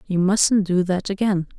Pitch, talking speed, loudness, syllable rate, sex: 190 Hz, 190 wpm, -20 LUFS, 4.3 syllables/s, female